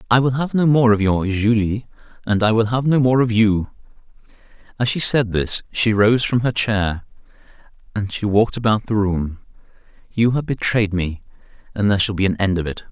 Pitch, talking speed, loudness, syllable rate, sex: 110 Hz, 200 wpm, -18 LUFS, 5.3 syllables/s, male